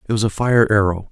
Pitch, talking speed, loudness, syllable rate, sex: 105 Hz, 270 wpm, -17 LUFS, 6.0 syllables/s, male